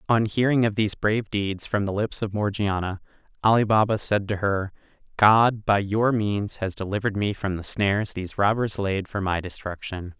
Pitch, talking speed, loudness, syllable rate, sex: 100 Hz, 190 wpm, -24 LUFS, 5.1 syllables/s, male